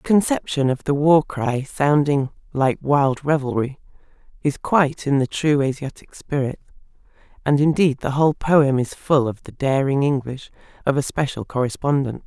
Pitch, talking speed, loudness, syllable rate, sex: 140 Hz, 155 wpm, -20 LUFS, 4.8 syllables/s, female